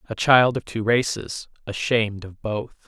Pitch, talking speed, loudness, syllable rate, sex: 110 Hz, 165 wpm, -22 LUFS, 4.4 syllables/s, male